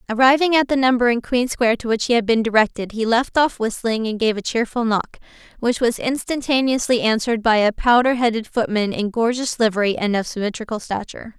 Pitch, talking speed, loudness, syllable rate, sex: 235 Hz, 200 wpm, -19 LUFS, 6.0 syllables/s, female